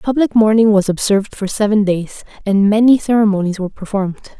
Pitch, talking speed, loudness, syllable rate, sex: 210 Hz, 165 wpm, -14 LUFS, 6.1 syllables/s, female